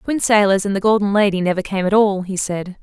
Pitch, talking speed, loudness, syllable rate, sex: 200 Hz, 275 wpm, -17 LUFS, 6.1 syllables/s, female